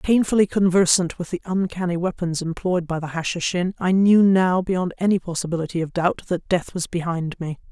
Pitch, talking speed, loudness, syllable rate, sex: 180 Hz, 180 wpm, -21 LUFS, 5.3 syllables/s, female